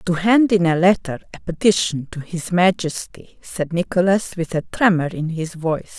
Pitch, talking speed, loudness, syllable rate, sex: 175 Hz, 180 wpm, -19 LUFS, 4.8 syllables/s, female